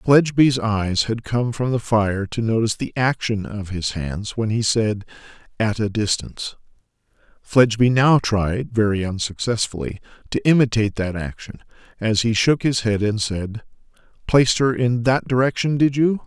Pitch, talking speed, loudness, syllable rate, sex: 115 Hz, 160 wpm, -20 LUFS, 4.5 syllables/s, male